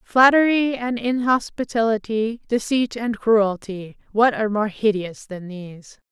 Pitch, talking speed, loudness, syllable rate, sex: 225 Hz, 110 wpm, -20 LUFS, 4.2 syllables/s, female